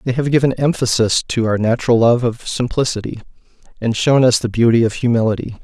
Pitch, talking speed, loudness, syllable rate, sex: 120 Hz, 180 wpm, -16 LUFS, 5.9 syllables/s, male